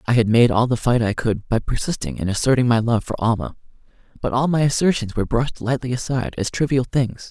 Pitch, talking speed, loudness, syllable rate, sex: 120 Hz, 220 wpm, -20 LUFS, 6.2 syllables/s, male